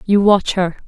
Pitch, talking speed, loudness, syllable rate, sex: 190 Hz, 205 wpm, -15 LUFS, 4.4 syllables/s, female